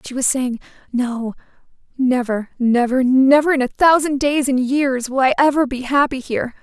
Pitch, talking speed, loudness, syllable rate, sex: 260 Hz, 170 wpm, -17 LUFS, 4.8 syllables/s, female